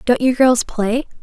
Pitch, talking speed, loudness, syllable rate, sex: 245 Hz, 195 wpm, -16 LUFS, 4.0 syllables/s, female